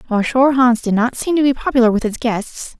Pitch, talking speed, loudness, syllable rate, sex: 245 Hz, 255 wpm, -16 LUFS, 5.8 syllables/s, female